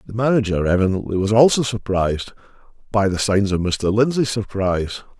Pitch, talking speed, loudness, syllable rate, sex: 105 Hz, 140 wpm, -19 LUFS, 5.7 syllables/s, male